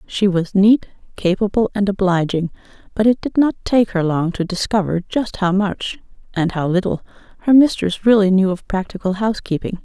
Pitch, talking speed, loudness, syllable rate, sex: 195 Hz, 160 wpm, -18 LUFS, 5.2 syllables/s, female